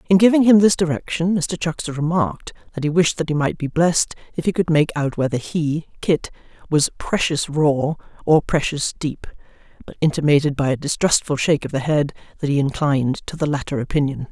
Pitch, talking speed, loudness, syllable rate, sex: 155 Hz, 195 wpm, -19 LUFS, 5.9 syllables/s, female